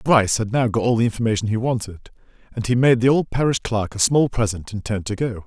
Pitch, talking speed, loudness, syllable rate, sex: 115 Hz, 255 wpm, -20 LUFS, 6.3 syllables/s, male